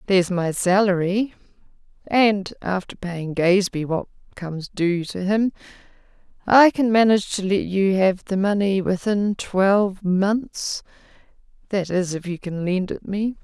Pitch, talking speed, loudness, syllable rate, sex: 195 Hz, 140 wpm, -21 LUFS, 4.3 syllables/s, female